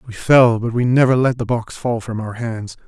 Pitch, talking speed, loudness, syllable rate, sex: 115 Hz, 250 wpm, -17 LUFS, 4.9 syllables/s, male